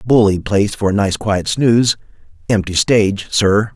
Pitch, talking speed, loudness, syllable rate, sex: 105 Hz, 145 wpm, -15 LUFS, 4.9 syllables/s, male